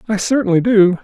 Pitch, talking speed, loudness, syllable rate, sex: 205 Hz, 175 wpm, -14 LUFS, 5.8 syllables/s, male